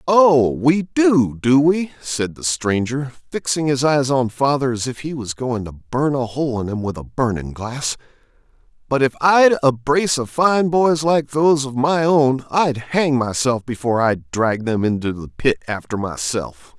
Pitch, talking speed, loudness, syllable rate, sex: 135 Hz, 190 wpm, -18 LUFS, 4.4 syllables/s, male